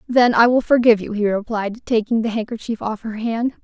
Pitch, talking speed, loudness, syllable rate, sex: 225 Hz, 215 wpm, -19 LUFS, 5.6 syllables/s, female